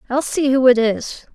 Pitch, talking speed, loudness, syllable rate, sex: 255 Hz, 225 wpm, -16 LUFS, 4.6 syllables/s, female